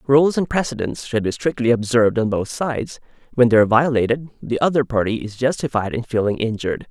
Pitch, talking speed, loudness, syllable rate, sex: 120 Hz, 190 wpm, -19 LUFS, 6.0 syllables/s, male